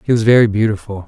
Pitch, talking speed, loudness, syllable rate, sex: 110 Hz, 225 wpm, -13 LUFS, 7.2 syllables/s, male